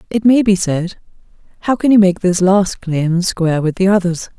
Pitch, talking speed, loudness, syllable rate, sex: 185 Hz, 205 wpm, -14 LUFS, 4.9 syllables/s, female